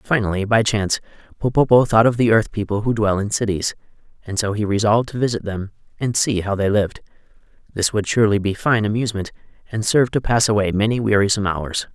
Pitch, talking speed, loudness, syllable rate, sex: 105 Hz, 195 wpm, -19 LUFS, 6.4 syllables/s, male